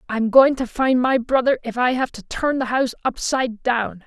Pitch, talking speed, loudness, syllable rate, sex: 250 Hz, 220 wpm, -20 LUFS, 5.1 syllables/s, female